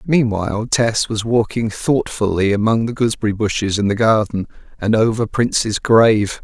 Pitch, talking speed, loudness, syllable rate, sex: 110 Hz, 150 wpm, -17 LUFS, 5.1 syllables/s, male